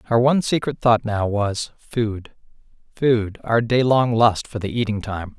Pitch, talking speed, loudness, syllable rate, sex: 115 Hz, 165 wpm, -20 LUFS, 4.2 syllables/s, male